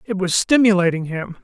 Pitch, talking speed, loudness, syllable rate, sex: 190 Hz, 170 wpm, -17 LUFS, 5.3 syllables/s, male